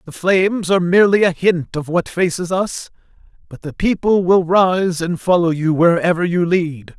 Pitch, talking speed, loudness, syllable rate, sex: 175 Hz, 180 wpm, -16 LUFS, 4.8 syllables/s, male